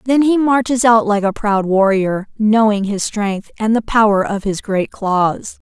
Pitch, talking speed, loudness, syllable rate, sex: 215 Hz, 190 wpm, -15 LUFS, 4.1 syllables/s, female